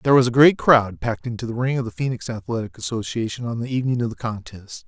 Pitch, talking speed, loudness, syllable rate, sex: 120 Hz, 245 wpm, -21 LUFS, 6.7 syllables/s, male